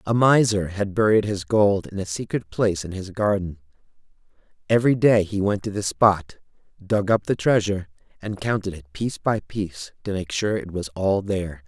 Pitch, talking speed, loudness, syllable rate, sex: 100 Hz, 190 wpm, -22 LUFS, 5.2 syllables/s, male